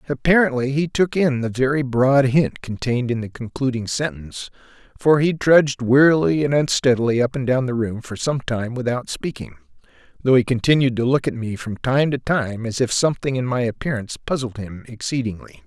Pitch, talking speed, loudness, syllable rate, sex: 125 Hz, 190 wpm, -20 LUFS, 5.5 syllables/s, male